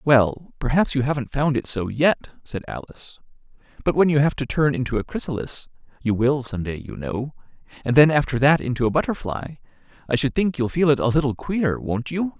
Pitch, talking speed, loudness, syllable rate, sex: 135 Hz, 200 wpm, -22 LUFS, 5.4 syllables/s, male